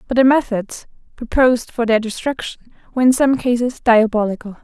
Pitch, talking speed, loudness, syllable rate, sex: 235 Hz, 155 wpm, -17 LUFS, 5.7 syllables/s, female